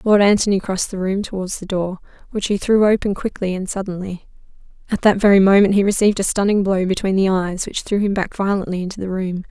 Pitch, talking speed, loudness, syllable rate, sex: 195 Hz, 220 wpm, -18 LUFS, 6.2 syllables/s, female